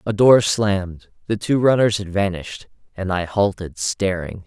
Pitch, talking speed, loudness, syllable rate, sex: 95 Hz, 160 wpm, -19 LUFS, 4.6 syllables/s, male